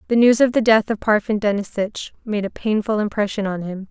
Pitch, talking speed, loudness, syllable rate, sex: 210 Hz, 215 wpm, -19 LUFS, 5.6 syllables/s, female